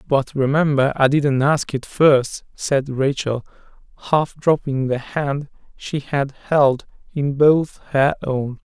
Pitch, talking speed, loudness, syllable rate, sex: 140 Hz, 140 wpm, -19 LUFS, 3.4 syllables/s, male